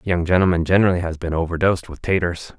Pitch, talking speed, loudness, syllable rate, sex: 85 Hz, 185 wpm, -19 LUFS, 6.8 syllables/s, male